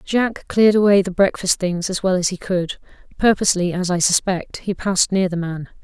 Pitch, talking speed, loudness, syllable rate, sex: 185 Hz, 205 wpm, -18 LUFS, 5.5 syllables/s, female